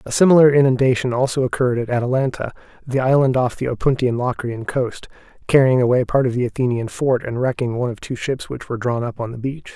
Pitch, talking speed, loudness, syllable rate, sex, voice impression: 125 Hz, 210 wpm, -19 LUFS, 6.3 syllables/s, male, masculine, adult-like, slightly relaxed, slightly weak, muffled, fluent, slightly raspy, slightly intellectual, sincere, friendly, slightly wild, kind, slightly modest